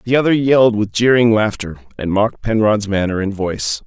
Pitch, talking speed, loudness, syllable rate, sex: 105 Hz, 185 wpm, -16 LUFS, 5.6 syllables/s, male